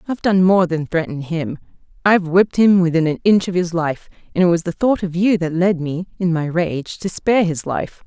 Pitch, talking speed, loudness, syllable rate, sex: 175 Hz, 240 wpm, -18 LUFS, 5.4 syllables/s, female